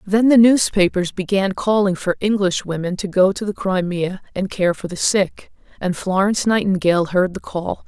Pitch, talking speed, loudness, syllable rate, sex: 190 Hz, 185 wpm, -18 LUFS, 4.9 syllables/s, female